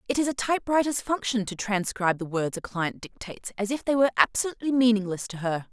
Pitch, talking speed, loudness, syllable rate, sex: 220 Hz, 210 wpm, -26 LUFS, 6.7 syllables/s, female